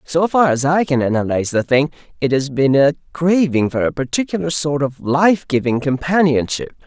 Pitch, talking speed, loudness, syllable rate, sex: 150 Hz, 185 wpm, -17 LUFS, 5.2 syllables/s, male